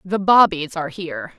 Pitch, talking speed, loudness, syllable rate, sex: 190 Hz, 175 wpm, -18 LUFS, 5.6 syllables/s, female